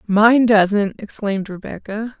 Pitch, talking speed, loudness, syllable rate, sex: 210 Hz, 110 wpm, -17 LUFS, 3.9 syllables/s, female